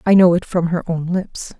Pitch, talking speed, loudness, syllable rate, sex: 175 Hz, 265 wpm, -17 LUFS, 5.0 syllables/s, female